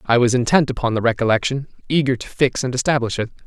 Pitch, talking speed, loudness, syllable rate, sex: 125 Hz, 210 wpm, -19 LUFS, 6.6 syllables/s, male